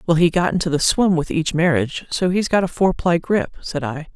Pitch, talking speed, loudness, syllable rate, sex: 170 Hz, 245 wpm, -19 LUFS, 5.3 syllables/s, female